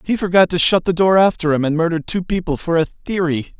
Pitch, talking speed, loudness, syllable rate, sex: 175 Hz, 250 wpm, -17 LUFS, 6.1 syllables/s, male